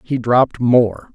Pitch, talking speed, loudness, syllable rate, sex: 120 Hz, 155 wpm, -15 LUFS, 3.9 syllables/s, male